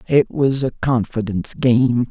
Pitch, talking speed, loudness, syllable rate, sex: 120 Hz, 140 wpm, -18 LUFS, 4.3 syllables/s, male